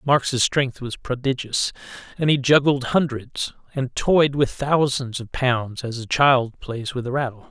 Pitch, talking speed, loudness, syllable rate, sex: 130 Hz, 170 wpm, -21 LUFS, 4.0 syllables/s, male